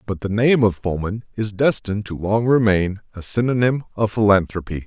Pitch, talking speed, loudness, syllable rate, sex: 105 Hz, 175 wpm, -19 LUFS, 5.3 syllables/s, male